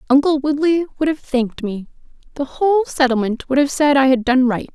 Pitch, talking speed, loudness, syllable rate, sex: 275 Hz, 190 wpm, -17 LUFS, 5.7 syllables/s, female